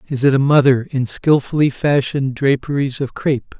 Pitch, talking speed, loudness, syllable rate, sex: 135 Hz, 165 wpm, -17 LUFS, 5.3 syllables/s, male